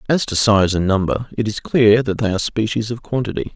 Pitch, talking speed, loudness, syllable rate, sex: 110 Hz, 235 wpm, -18 LUFS, 5.7 syllables/s, male